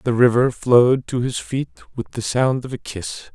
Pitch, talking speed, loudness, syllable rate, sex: 120 Hz, 215 wpm, -19 LUFS, 4.6 syllables/s, male